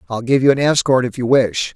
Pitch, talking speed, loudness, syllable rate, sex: 130 Hz, 275 wpm, -15 LUFS, 5.8 syllables/s, male